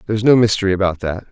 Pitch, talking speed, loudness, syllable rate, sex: 100 Hz, 275 wpm, -16 LUFS, 8.8 syllables/s, male